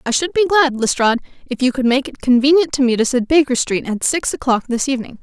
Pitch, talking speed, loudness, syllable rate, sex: 260 Hz, 255 wpm, -16 LUFS, 6.2 syllables/s, female